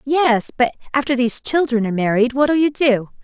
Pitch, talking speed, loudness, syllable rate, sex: 250 Hz, 185 wpm, -17 LUFS, 5.5 syllables/s, female